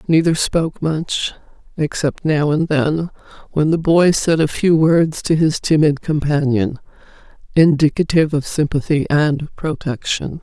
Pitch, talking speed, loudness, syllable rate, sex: 155 Hz, 130 wpm, -17 LUFS, 4.3 syllables/s, female